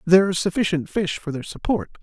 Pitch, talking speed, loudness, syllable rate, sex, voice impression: 175 Hz, 205 wpm, -22 LUFS, 6.4 syllables/s, male, masculine, adult-like, tensed, powerful, clear, intellectual, friendly, lively, slightly sharp